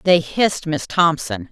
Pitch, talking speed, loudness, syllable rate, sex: 160 Hz, 160 wpm, -18 LUFS, 4.3 syllables/s, female